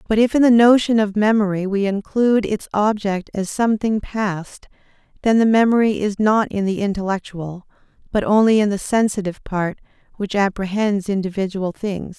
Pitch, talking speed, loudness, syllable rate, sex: 205 Hz, 160 wpm, -18 LUFS, 5.1 syllables/s, female